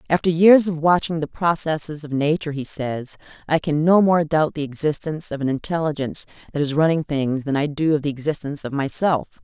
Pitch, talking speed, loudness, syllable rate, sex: 155 Hz, 205 wpm, -20 LUFS, 5.9 syllables/s, female